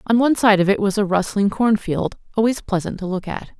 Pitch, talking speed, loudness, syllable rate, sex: 205 Hz, 235 wpm, -19 LUFS, 6.0 syllables/s, female